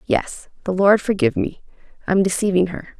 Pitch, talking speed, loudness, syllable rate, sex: 195 Hz, 140 wpm, -19 LUFS, 5.2 syllables/s, female